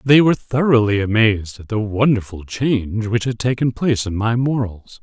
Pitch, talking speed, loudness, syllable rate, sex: 115 Hz, 180 wpm, -18 LUFS, 5.3 syllables/s, male